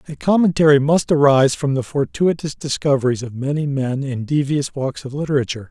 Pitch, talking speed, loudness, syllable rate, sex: 140 Hz, 170 wpm, -18 LUFS, 5.8 syllables/s, male